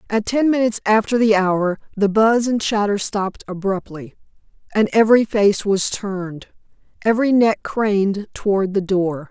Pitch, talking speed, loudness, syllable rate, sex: 205 Hz, 150 wpm, -18 LUFS, 4.8 syllables/s, female